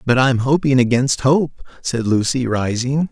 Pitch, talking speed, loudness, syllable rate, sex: 130 Hz, 175 wpm, -17 LUFS, 4.8 syllables/s, male